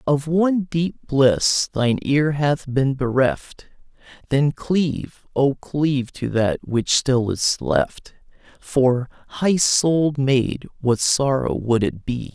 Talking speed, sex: 135 wpm, male